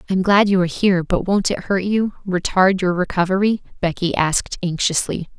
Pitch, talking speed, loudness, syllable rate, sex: 185 Hz, 190 wpm, -18 LUFS, 5.8 syllables/s, female